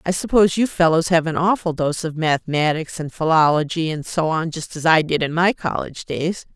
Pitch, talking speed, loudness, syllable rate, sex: 165 Hz, 210 wpm, -19 LUFS, 5.5 syllables/s, female